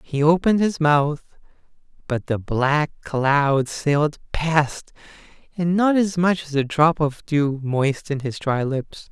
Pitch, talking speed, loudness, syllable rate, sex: 150 Hz, 150 wpm, -21 LUFS, 3.8 syllables/s, male